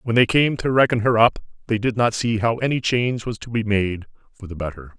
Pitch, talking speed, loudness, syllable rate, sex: 115 Hz, 255 wpm, -20 LUFS, 5.9 syllables/s, male